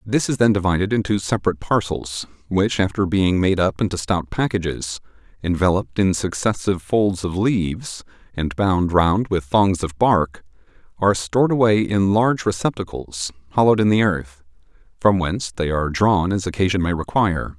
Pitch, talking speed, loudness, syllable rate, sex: 95 Hz, 160 wpm, -20 LUFS, 5.3 syllables/s, male